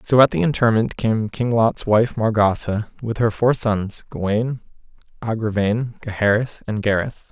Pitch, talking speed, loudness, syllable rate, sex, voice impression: 110 Hz, 150 wpm, -20 LUFS, 4.7 syllables/s, male, very masculine, adult-like, slightly thick, cool, sincere, slightly calm, slightly sweet